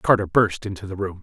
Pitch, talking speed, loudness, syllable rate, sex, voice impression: 100 Hz, 245 wpm, -22 LUFS, 5.9 syllables/s, male, masculine, adult-like, middle-aged, thick, tensed, powerful, very bright, slightly soft, clear, fluent, slightly raspy, cool, intellectual, slightly refreshing, sincere, slightly calm, mature, slightly friendly, slightly reassuring, slightly elegant, slightly sweet, lively, intense, slightly sharp